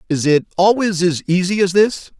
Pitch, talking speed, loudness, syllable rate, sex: 185 Hz, 190 wpm, -16 LUFS, 4.8 syllables/s, male